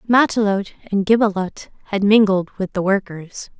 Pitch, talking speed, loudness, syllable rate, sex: 200 Hz, 135 wpm, -18 LUFS, 5.3 syllables/s, female